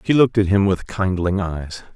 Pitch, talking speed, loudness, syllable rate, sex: 95 Hz, 215 wpm, -19 LUFS, 5.1 syllables/s, male